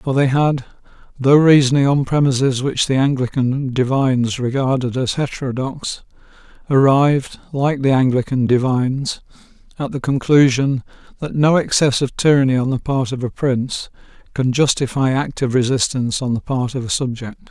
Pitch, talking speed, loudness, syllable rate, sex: 130 Hz, 145 wpm, -17 LUFS, 5.2 syllables/s, male